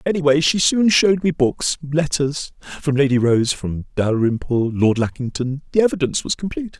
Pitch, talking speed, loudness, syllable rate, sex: 145 Hz, 140 wpm, -19 LUFS, 5.2 syllables/s, male